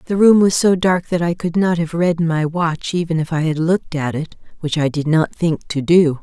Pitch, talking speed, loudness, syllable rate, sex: 165 Hz, 260 wpm, -17 LUFS, 5.0 syllables/s, female